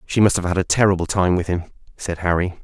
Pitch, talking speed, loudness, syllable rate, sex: 90 Hz, 250 wpm, -19 LUFS, 6.4 syllables/s, male